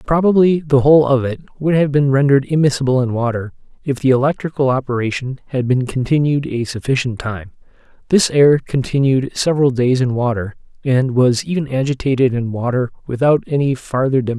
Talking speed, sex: 165 wpm, male